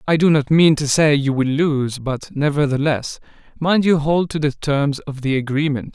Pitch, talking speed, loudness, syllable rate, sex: 145 Hz, 200 wpm, -18 LUFS, 4.6 syllables/s, male